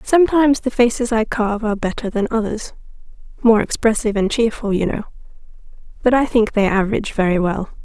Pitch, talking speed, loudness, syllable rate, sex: 220 Hz, 155 wpm, -18 LUFS, 6.3 syllables/s, female